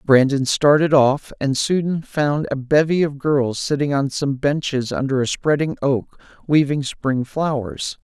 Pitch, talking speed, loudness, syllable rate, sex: 140 Hz, 155 wpm, -19 LUFS, 4.0 syllables/s, male